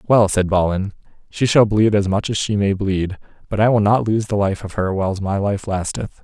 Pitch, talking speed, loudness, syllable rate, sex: 100 Hz, 240 wpm, -18 LUFS, 5.2 syllables/s, male